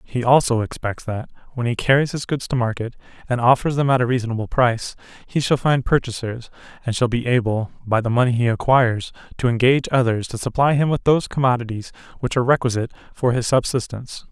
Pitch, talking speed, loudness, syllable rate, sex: 125 Hz, 195 wpm, -20 LUFS, 6.3 syllables/s, male